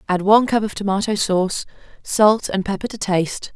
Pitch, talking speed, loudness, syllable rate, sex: 200 Hz, 185 wpm, -19 LUFS, 5.6 syllables/s, female